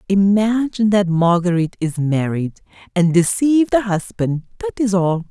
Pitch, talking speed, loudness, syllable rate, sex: 190 Hz, 135 wpm, -17 LUFS, 4.8 syllables/s, female